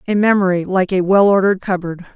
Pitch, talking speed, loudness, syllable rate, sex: 190 Hz, 195 wpm, -15 LUFS, 6.2 syllables/s, female